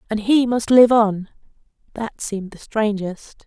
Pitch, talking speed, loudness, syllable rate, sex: 220 Hz, 155 wpm, -18 LUFS, 4.1 syllables/s, female